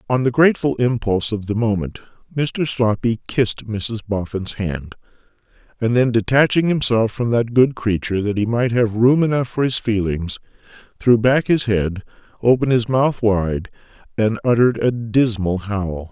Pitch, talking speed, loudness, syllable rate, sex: 115 Hz, 160 wpm, -18 LUFS, 4.9 syllables/s, male